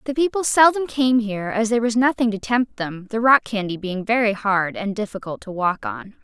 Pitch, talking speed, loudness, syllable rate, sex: 220 Hz, 220 wpm, -20 LUFS, 5.3 syllables/s, female